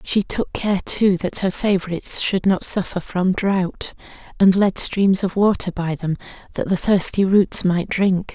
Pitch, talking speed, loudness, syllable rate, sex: 185 Hz, 180 wpm, -19 LUFS, 4.2 syllables/s, female